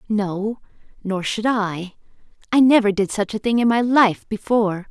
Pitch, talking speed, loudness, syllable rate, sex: 215 Hz, 160 wpm, -19 LUFS, 4.6 syllables/s, female